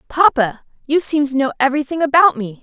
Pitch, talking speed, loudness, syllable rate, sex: 280 Hz, 185 wpm, -16 LUFS, 6.0 syllables/s, female